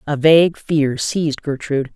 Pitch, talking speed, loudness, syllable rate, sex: 145 Hz, 155 wpm, -17 LUFS, 5.0 syllables/s, female